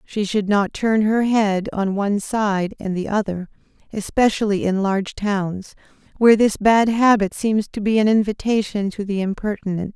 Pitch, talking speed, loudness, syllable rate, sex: 205 Hz, 170 wpm, -19 LUFS, 4.8 syllables/s, female